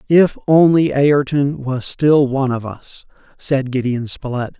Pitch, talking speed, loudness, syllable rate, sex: 135 Hz, 145 wpm, -16 LUFS, 4.0 syllables/s, male